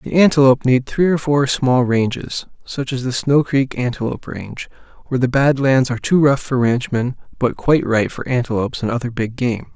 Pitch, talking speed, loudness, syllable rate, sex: 130 Hz, 205 wpm, -17 LUFS, 5.5 syllables/s, male